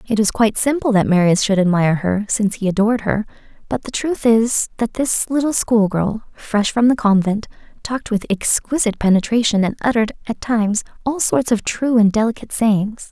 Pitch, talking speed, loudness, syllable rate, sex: 220 Hz, 190 wpm, -17 LUFS, 5.6 syllables/s, female